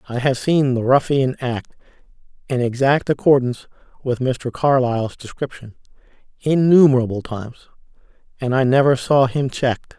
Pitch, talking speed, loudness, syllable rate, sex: 130 Hz, 125 wpm, -18 LUFS, 5.2 syllables/s, male